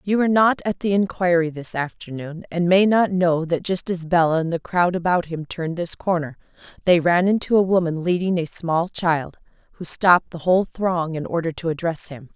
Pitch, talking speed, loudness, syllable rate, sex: 175 Hz, 210 wpm, -21 LUFS, 5.2 syllables/s, female